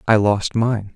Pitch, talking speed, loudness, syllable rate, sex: 105 Hz, 190 wpm, -18 LUFS, 3.7 syllables/s, male